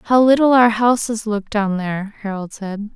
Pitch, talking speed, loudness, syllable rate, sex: 215 Hz, 185 wpm, -17 LUFS, 4.6 syllables/s, female